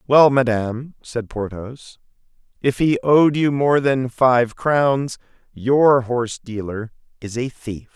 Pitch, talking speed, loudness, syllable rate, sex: 125 Hz, 130 wpm, -19 LUFS, 3.6 syllables/s, male